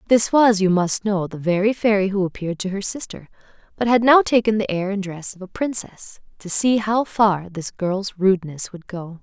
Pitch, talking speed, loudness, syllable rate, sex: 200 Hz, 215 wpm, -20 LUFS, 5.0 syllables/s, female